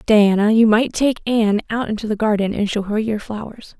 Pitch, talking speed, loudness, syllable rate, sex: 215 Hz, 220 wpm, -18 LUFS, 5.4 syllables/s, female